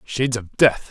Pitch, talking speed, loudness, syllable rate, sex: 120 Hz, 200 wpm, -20 LUFS, 4.9 syllables/s, male